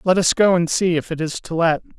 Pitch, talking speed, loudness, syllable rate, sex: 170 Hz, 305 wpm, -19 LUFS, 5.7 syllables/s, male